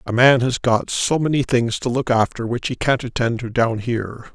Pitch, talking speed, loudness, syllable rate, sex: 120 Hz, 235 wpm, -19 LUFS, 5.1 syllables/s, male